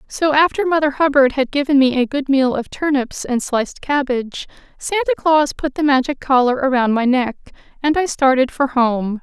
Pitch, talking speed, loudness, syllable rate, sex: 270 Hz, 190 wpm, -17 LUFS, 5.1 syllables/s, female